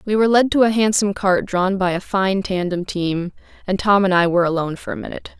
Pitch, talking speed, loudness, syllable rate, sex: 190 Hz, 245 wpm, -18 LUFS, 6.4 syllables/s, female